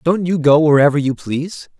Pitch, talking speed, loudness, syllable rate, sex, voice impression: 155 Hz, 200 wpm, -15 LUFS, 5.5 syllables/s, male, masculine, adult-like, slightly cool, slightly refreshing, sincere, friendly, slightly kind